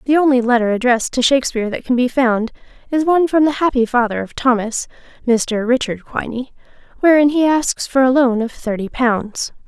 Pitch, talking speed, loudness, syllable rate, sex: 250 Hz, 185 wpm, -16 LUFS, 5.5 syllables/s, female